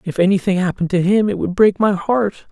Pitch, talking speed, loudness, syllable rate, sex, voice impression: 185 Hz, 240 wpm, -16 LUFS, 5.8 syllables/s, male, masculine, adult-like, cool, sincere, slightly sweet